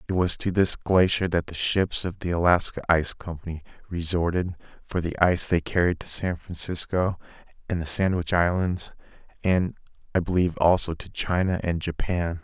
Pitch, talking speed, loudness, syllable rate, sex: 85 Hz, 165 wpm, -25 LUFS, 5.2 syllables/s, male